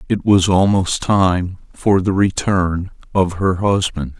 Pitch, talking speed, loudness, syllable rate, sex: 95 Hz, 145 wpm, -17 LUFS, 3.6 syllables/s, male